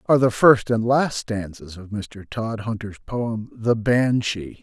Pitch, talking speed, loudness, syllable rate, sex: 110 Hz, 155 wpm, -22 LUFS, 3.9 syllables/s, male